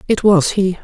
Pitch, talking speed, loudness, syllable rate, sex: 195 Hz, 215 wpm, -14 LUFS, 4.6 syllables/s, female